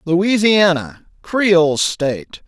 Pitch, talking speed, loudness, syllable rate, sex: 185 Hz, 75 wpm, -15 LUFS, 3.1 syllables/s, male